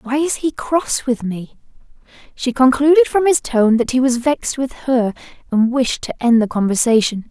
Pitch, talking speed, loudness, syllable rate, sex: 255 Hz, 190 wpm, -16 LUFS, 4.8 syllables/s, female